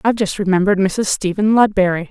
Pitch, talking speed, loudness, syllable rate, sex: 200 Hz, 170 wpm, -16 LUFS, 6.5 syllables/s, female